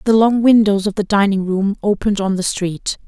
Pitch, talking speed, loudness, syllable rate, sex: 205 Hz, 215 wpm, -16 LUFS, 5.4 syllables/s, female